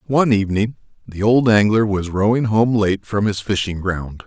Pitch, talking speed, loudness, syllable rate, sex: 105 Hz, 185 wpm, -18 LUFS, 5.0 syllables/s, male